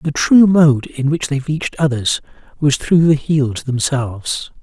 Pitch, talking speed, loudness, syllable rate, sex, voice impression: 145 Hz, 170 wpm, -15 LUFS, 4.4 syllables/s, male, masculine, adult-like, slightly relaxed, soft, fluent, calm, friendly, kind, slightly modest